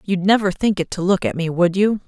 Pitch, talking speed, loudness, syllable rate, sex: 190 Hz, 290 wpm, -18 LUFS, 5.7 syllables/s, female